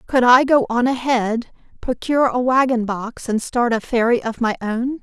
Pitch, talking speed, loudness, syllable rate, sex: 240 Hz, 190 wpm, -18 LUFS, 4.7 syllables/s, female